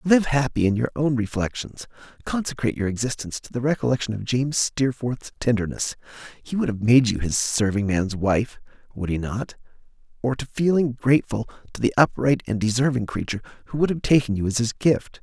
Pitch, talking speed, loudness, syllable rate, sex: 120 Hz, 175 wpm, -23 LUFS, 5.8 syllables/s, male